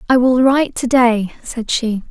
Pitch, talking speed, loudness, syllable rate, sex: 245 Hz, 200 wpm, -15 LUFS, 4.5 syllables/s, female